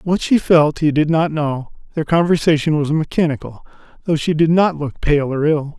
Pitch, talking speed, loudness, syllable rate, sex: 155 Hz, 195 wpm, -17 LUFS, 5.0 syllables/s, male